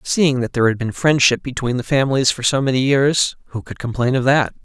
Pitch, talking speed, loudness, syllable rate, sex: 130 Hz, 235 wpm, -17 LUFS, 5.8 syllables/s, male